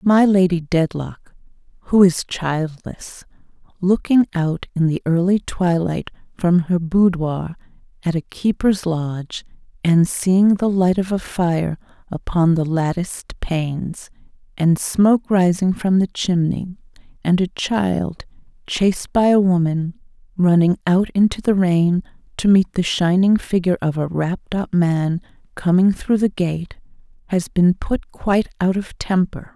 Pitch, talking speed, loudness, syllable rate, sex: 180 Hz, 140 wpm, -18 LUFS, 4.0 syllables/s, female